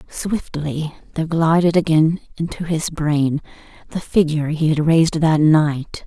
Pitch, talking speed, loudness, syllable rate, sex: 160 Hz, 140 wpm, -18 LUFS, 4.4 syllables/s, female